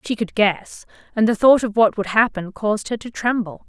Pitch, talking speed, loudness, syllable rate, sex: 215 Hz, 230 wpm, -19 LUFS, 5.3 syllables/s, female